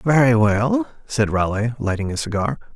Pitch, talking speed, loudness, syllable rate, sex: 115 Hz, 150 wpm, -20 LUFS, 4.8 syllables/s, male